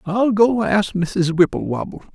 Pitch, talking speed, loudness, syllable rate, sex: 180 Hz, 140 wpm, -18 LUFS, 4.1 syllables/s, male